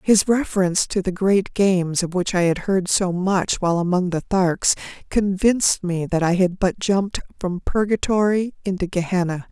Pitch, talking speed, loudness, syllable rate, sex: 185 Hz, 175 wpm, -20 LUFS, 4.9 syllables/s, female